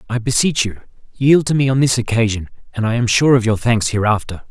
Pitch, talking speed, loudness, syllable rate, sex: 120 Hz, 225 wpm, -16 LUFS, 5.9 syllables/s, male